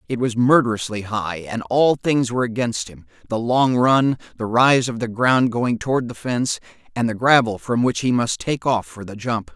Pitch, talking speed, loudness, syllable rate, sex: 115 Hz, 215 wpm, -20 LUFS, 4.9 syllables/s, male